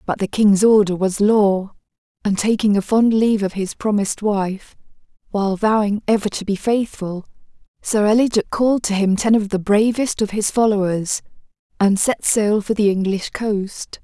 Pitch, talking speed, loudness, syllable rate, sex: 205 Hz, 170 wpm, -18 LUFS, 4.8 syllables/s, female